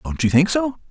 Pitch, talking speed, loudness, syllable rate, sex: 170 Hz, 265 wpm, -18 LUFS, 5.5 syllables/s, male